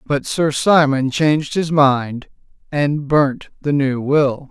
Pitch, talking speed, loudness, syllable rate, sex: 145 Hz, 145 wpm, -17 LUFS, 3.3 syllables/s, male